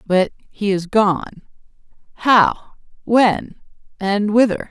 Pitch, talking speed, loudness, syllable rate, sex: 205 Hz, 65 wpm, -17 LUFS, 3.5 syllables/s, female